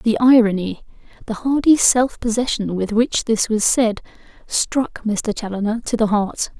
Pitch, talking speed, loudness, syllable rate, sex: 225 Hz, 155 wpm, -18 LUFS, 4.4 syllables/s, female